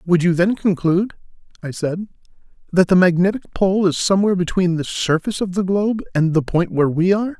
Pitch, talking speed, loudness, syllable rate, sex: 185 Hz, 195 wpm, -18 LUFS, 6.2 syllables/s, male